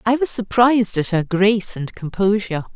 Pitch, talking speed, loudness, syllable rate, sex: 205 Hz, 175 wpm, -18 LUFS, 5.5 syllables/s, female